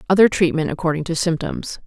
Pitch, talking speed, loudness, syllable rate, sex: 170 Hz, 160 wpm, -19 LUFS, 6.0 syllables/s, female